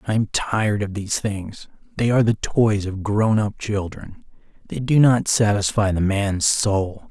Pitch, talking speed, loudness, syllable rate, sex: 105 Hz, 175 wpm, -20 LUFS, 4.4 syllables/s, male